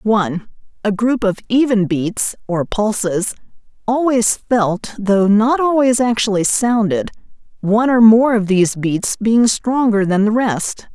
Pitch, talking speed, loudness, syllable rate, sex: 215 Hz, 145 wpm, -15 LUFS, 4.2 syllables/s, female